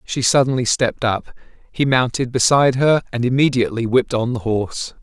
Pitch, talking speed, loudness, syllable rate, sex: 125 Hz, 165 wpm, -18 LUFS, 5.9 syllables/s, male